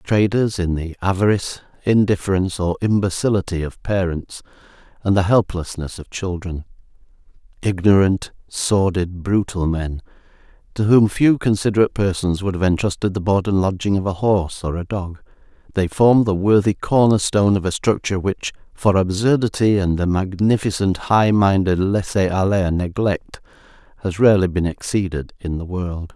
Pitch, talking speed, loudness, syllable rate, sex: 95 Hz, 140 wpm, -19 LUFS, 5.1 syllables/s, male